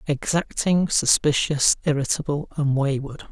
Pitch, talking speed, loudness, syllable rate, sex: 145 Hz, 90 wpm, -21 LUFS, 4.3 syllables/s, male